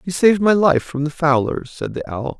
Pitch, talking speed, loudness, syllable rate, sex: 160 Hz, 250 wpm, -18 LUFS, 5.4 syllables/s, male